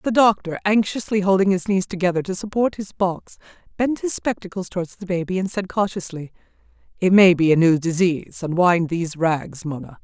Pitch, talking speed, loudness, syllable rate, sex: 185 Hz, 180 wpm, -20 LUFS, 5.4 syllables/s, female